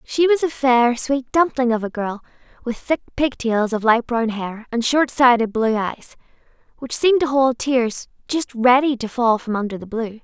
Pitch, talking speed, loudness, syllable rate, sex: 245 Hz, 205 wpm, -19 LUFS, 4.6 syllables/s, female